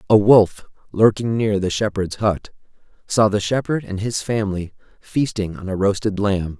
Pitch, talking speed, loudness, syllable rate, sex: 105 Hz, 165 wpm, -19 LUFS, 4.7 syllables/s, male